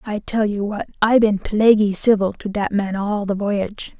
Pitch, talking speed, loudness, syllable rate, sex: 205 Hz, 210 wpm, -19 LUFS, 4.7 syllables/s, female